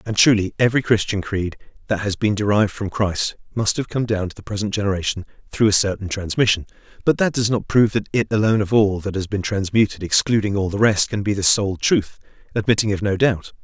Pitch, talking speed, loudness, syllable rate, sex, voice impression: 105 Hz, 220 wpm, -20 LUFS, 6.1 syllables/s, male, masculine, slightly middle-aged, slightly powerful, clear, fluent, raspy, cool, slightly mature, reassuring, elegant, wild, kind, slightly strict